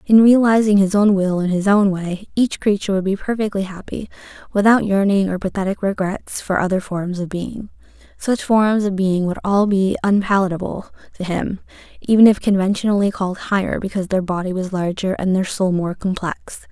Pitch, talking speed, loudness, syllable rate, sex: 195 Hz, 180 wpm, -18 LUFS, 5.3 syllables/s, female